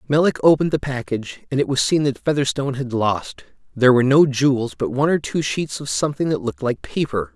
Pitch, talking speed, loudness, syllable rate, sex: 135 Hz, 220 wpm, -20 LUFS, 6.4 syllables/s, male